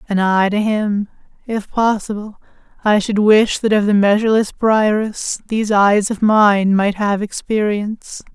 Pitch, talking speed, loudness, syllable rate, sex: 210 Hz, 150 wpm, -16 LUFS, 4.3 syllables/s, female